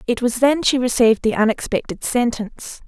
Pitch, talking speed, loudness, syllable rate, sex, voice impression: 240 Hz, 165 wpm, -18 LUFS, 5.6 syllables/s, female, feminine, adult-like, tensed, bright, soft, slightly raspy, calm, friendly, reassuring, lively, kind